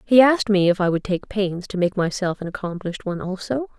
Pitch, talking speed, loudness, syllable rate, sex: 195 Hz, 240 wpm, -21 LUFS, 6.1 syllables/s, female